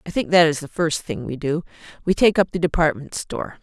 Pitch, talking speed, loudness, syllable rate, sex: 160 Hz, 250 wpm, -21 LUFS, 5.9 syllables/s, female